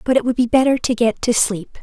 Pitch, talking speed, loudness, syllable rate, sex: 240 Hz, 295 wpm, -17 LUFS, 5.9 syllables/s, female